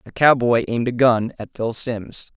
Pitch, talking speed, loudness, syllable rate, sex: 120 Hz, 200 wpm, -19 LUFS, 4.8 syllables/s, male